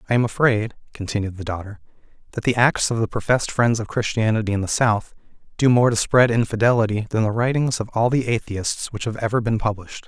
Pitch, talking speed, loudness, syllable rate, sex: 110 Hz, 210 wpm, -20 LUFS, 6.2 syllables/s, male